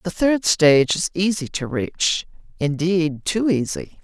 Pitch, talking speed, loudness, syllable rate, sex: 170 Hz, 135 wpm, -20 LUFS, 4.0 syllables/s, female